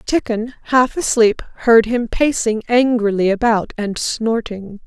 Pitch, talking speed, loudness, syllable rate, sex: 225 Hz, 125 wpm, -17 LUFS, 3.9 syllables/s, female